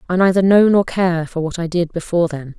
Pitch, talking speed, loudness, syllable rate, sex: 175 Hz, 255 wpm, -16 LUFS, 5.8 syllables/s, female